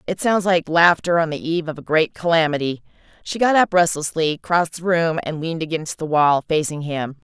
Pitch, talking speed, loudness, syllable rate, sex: 165 Hz, 205 wpm, -19 LUFS, 5.5 syllables/s, female